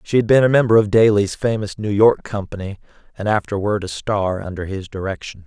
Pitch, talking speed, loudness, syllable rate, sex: 100 Hz, 200 wpm, -18 LUFS, 5.6 syllables/s, male